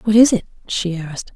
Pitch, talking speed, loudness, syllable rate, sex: 200 Hz, 220 wpm, -18 LUFS, 6.0 syllables/s, female